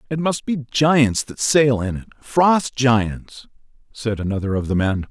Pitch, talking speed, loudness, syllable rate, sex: 125 Hz, 175 wpm, -19 LUFS, 4.0 syllables/s, male